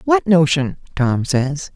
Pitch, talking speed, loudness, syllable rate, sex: 160 Hz, 135 wpm, -17 LUFS, 3.4 syllables/s, male